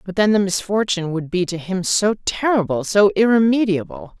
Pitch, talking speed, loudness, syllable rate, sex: 195 Hz, 155 wpm, -18 LUFS, 5.4 syllables/s, female